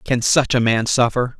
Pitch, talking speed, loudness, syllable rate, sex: 120 Hz, 215 wpm, -17 LUFS, 4.4 syllables/s, male